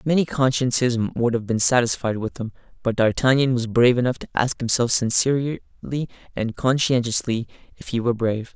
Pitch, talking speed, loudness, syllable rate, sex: 120 Hz, 160 wpm, -21 LUFS, 5.8 syllables/s, male